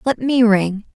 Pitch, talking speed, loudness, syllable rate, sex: 225 Hz, 185 wpm, -16 LUFS, 3.9 syllables/s, female